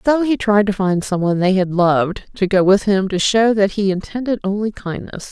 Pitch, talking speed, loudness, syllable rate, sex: 200 Hz, 235 wpm, -17 LUFS, 5.4 syllables/s, female